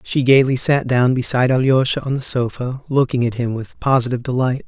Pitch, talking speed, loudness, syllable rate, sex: 125 Hz, 195 wpm, -17 LUFS, 5.8 syllables/s, male